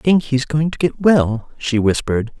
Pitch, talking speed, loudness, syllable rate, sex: 140 Hz, 225 wpm, -17 LUFS, 4.9 syllables/s, male